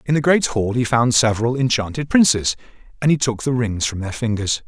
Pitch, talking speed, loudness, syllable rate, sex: 120 Hz, 220 wpm, -18 LUFS, 5.6 syllables/s, male